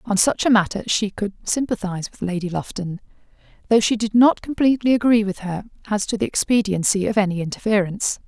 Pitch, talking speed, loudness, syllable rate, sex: 205 Hz, 180 wpm, -20 LUFS, 6.1 syllables/s, female